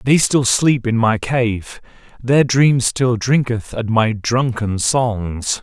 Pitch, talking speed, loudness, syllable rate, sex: 120 Hz, 150 wpm, -16 LUFS, 3.1 syllables/s, male